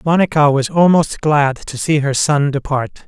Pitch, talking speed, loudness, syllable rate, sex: 145 Hz, 175 wpm, -15 LUFS, 4.4 syllables/s, male